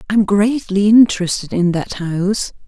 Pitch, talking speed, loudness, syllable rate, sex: 200 Hz, 135 wpm, -15 LUFS, 4.6 syllables/s, female